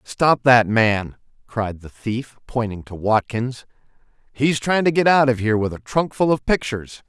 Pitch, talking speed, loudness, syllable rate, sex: 125 Hz, 180 wpm, -20 LUFS, 4.5 syllables/s, male